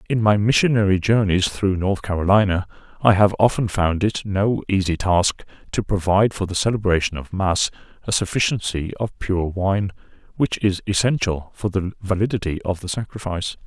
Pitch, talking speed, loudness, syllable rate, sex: 100 Hz, 160 wpm, -20 LUFS, 5.2 syllables/s, male